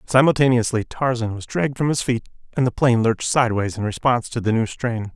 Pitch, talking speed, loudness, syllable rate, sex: 120 Hz, 210 wpm, -20 LUFS, 6.3 syllables/s, male